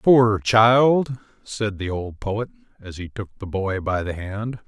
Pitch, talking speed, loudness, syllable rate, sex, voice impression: 110 Hz, 180 wpm, -21 LUFS, 3.8 syllables/s, male, very masculine, very adult-like, old, very thick, slightly tensed, very powerful, bright, soft, clear, fluent, slightly raspy, very cool, very intellectual, slightly refreshing, sincere, very calm, very mature, very friendly, very reassuring, very unique, elegant, very wild, sweet, kind, slightly intense